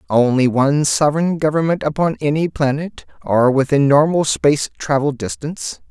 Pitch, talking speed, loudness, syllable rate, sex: 145 Hz, 130 wpm, -17 LUFS, 5.2 syllables/s, male